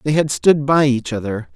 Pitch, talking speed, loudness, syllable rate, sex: 135 Hz, 230 wpm, -17 LUFS, 4.9 syllables/s, male